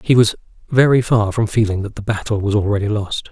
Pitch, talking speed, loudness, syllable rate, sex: 105 Hz, 215 wpm, -17 LUFS, 5.8 syllables/s, male